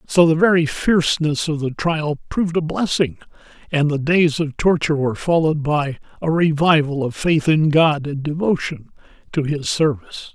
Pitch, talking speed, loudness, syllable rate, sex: 155 Hz, 170 wpm, -18 LUFS, 5.1 syllables/s, male